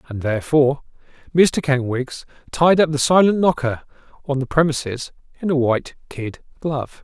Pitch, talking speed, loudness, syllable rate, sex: 145 Hz, 145 wpm, -19 LUFS, 5.2 syllables/s, male